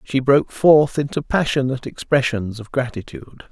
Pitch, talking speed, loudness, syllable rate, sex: 130 Hz, 135 wpm, -19 LUFS, 5.3 syllables/s, male